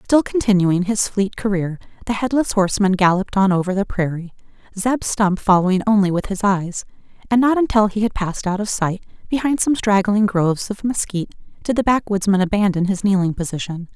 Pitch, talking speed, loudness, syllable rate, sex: 200 Hz, 175 wpm, -19 LUFS, 5.7 syllables/s, female